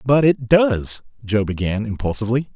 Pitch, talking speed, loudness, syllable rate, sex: 120 Hz, 115 wpm, -19 LUFS, 5.0 syllables/s, male